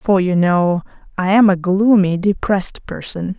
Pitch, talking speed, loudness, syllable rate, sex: 190 Hz, 160 wpm, -16 LUFS, 4.3 syllables/s, female